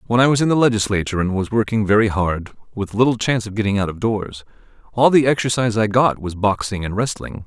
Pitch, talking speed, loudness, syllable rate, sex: 110 Hz, 225 wpm, -18 LUFS, 6.3 syllables/s, male